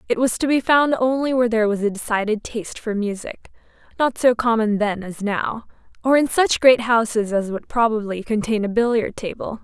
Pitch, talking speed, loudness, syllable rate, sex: 225 Hz, 200 wpm, -20 LUFS, 5.4 syllables/s, female